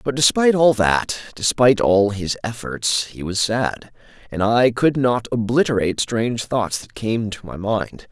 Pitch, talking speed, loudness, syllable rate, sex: 115 Hz, 170 wpm, -19 LUFS, 4.5 syllables/s, male